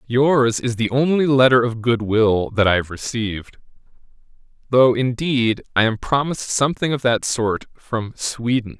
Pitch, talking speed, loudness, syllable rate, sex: 120 Hz, 150 wpm, -19 LUFS, 4.5 syllables/s, male